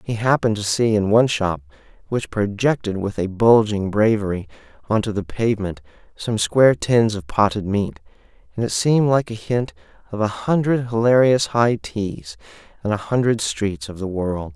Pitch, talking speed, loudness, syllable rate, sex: 105 Hz, 175 wpm, -20 LUFS, 5.0 syllables/s, male